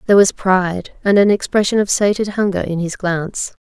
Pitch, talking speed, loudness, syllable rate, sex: 195 Hz, 200 wpm, -16 LUFS, 5.7 syllables/s, female